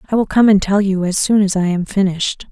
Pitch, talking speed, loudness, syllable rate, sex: 195 Hz, 285 wpm, -15 LUFS, 5.9 syllables/s, female